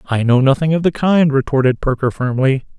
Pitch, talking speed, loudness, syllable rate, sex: 140 Hz, 195 wpm, -15 LUFS, 5.5 syllables/s, male